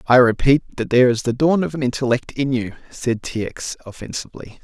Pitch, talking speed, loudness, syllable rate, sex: 125 Hz, 205 wpm, -19 LUFS, 5.9 syllables/s, male